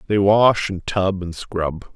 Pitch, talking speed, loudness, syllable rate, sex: 95 Hz, 185 wpm, -19 LUFS, 3.5 syllables/s, male